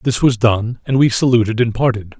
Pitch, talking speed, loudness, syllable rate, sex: 115 Hz, 220 wpm, -15 LUFS, 5.2 syllables/s, male